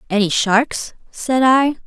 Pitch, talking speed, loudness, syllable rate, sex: 240 Hz, 130 wpm, -16 LUFS, 3.5 syllables/s, female